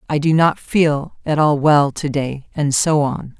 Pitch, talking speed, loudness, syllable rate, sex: 150 Hz, 210 wpm, -17 LUFS, 3.9 syllables/s, female